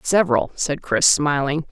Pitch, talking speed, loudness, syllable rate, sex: 155 Hz, 140 wpm, -19 LUFS, 4.5 syllables/s, female